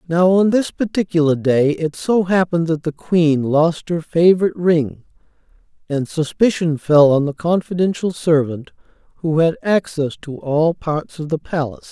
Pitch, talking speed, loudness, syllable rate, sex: 165 Hz, 155 wpm, -17 LUFS, 4.6 syllables/s, male